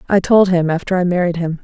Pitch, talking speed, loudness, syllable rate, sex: 180 Hz, 260 wpm, -15 LUFS, 6.2 syllables/s, female